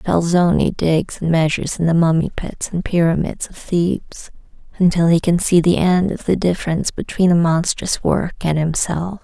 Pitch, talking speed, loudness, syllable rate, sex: 170 Hz, 175 wpm, -17 LUFS, 4.9 syllables/s, female